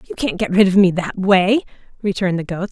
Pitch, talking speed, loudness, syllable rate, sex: 190 Hz, 245 wpm, -17 LUFS, 5.9 syllables/s, female